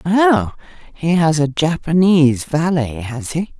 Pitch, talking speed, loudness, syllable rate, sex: 160 Hz, 135 wpm, -16 LUFS, 3.9 syllables/s, female